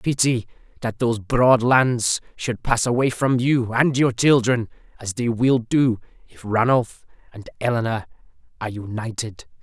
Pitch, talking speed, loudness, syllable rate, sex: 115 Hz, 145 wpm, -21 LUFS, 4.4 syllables/s, male